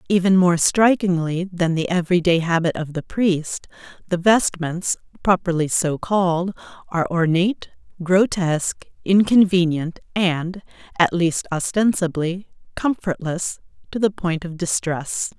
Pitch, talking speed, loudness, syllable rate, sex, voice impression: 175 Hz, 115 wpm, -20 LUFS, 4.4 syllables/s, female, feminine, very adult-like, very middle-aged, slightly thin, tensed, slightly powerful, slightly bright, slightly soft, clear, fluent, slightly cool, slightly intellectual, refreshing, sincere, calm, friendly, slightly reassuring, slightly elegant, slightly lively, slightly strict, slightly intense, slightly modest